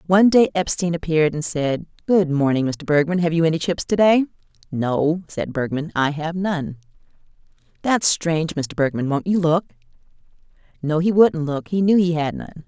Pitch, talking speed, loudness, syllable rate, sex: 165 Hz, 180 wpm, -20 LUFS, 5.1 syllables/s, female